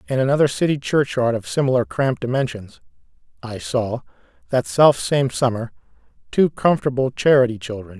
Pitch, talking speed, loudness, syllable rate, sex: 130 Hz, 130 wpm, -19 LUFS, 5.7 syllables/s, male